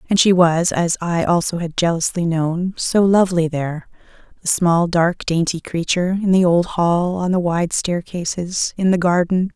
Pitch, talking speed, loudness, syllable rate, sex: 175 Hz, 175 wpm, -18 LUFS, 4.6 syllables/s, female